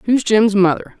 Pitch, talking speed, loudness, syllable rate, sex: 205 Hz, 180 wpm, -14 LUFS, 4.7 syllables/s, male